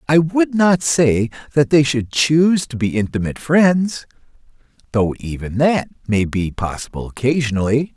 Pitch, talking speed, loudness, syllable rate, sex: 135 Hz, 135 wpm, -17 LUFS, 4.6 syllables/s, male